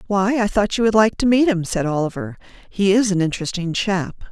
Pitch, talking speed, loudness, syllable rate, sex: 195 Hz, 220 wpm, -19 LUFS, 5.5 syllables/s, female